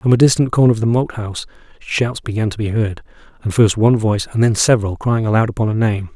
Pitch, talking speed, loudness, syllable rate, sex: 110 Hz, 245 wpm, -16 LUFS, 6.5 syllables/s, male